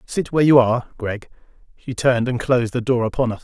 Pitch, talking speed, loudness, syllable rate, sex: 125 Hz, 225 wpm, -19 LUFS, 6.7 syllables/s, male